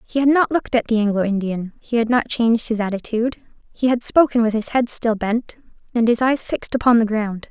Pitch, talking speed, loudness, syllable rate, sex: 230 Hz, 230 wpm, -19 LUFS, 5.9 syllables/s, female